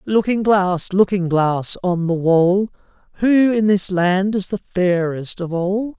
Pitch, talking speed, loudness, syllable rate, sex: 190 Hz, 160 wpm, -18 LUFS, 3.6 syllables/s, male